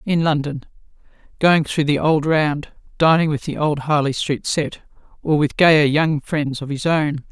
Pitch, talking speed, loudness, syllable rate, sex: 150 Hz, 170 wpm, -18 LUFS, 4.3 syllables/s, female